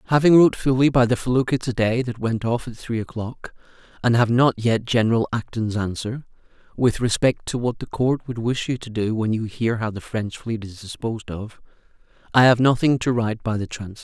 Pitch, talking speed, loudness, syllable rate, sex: 115 Hz, 205 wpm, -21 LUFS, 5.5 syllables/s, male